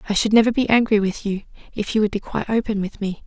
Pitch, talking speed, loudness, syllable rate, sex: 210 Hz, 275 wpm, -20 LUFS, 6.8 syllables/s, female